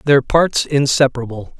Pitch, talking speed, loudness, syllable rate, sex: 135 Hz, 115 wpm, -15 LUFS, 4.9 syllables/s, male